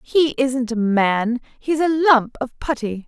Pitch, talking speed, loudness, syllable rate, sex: 255 Hz, 175 wpm, -19 LUFS, 3.6 syllables/s, female